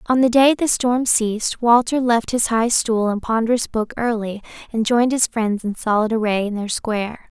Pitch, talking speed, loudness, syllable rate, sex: 230 Hz, 205 wpm, -19 LUFS, 5.0 syllables/s, female